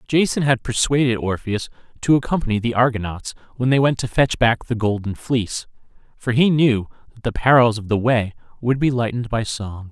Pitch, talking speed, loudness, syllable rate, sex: 120 Hz, 190 wpm, -20 LUFS, 5.5 syllables/s, male